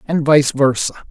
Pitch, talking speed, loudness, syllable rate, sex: 145 Hz, 165 wpm, -15 LUFS, 4.9 syllables/s, male